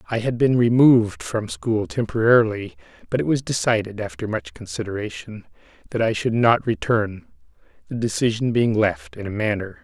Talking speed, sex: 185 wpm, male